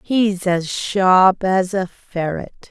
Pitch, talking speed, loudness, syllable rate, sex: 185 Hz, 135 wpm, -18 LUFS, 2.9 syllables/s, female